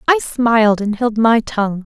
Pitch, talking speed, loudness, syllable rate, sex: 225 Hz, 180 wpm, -15 LUFS, 4.7 syllables/s, female